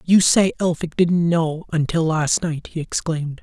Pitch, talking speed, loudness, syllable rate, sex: 165 Hz, 175 wpm, -20 LUFS, 4.4 syllables/s, male